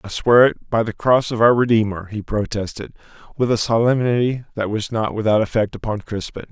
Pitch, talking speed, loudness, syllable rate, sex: 110 Hz, 195 wpm, -19 LUFS, 5.6 syllables/s, male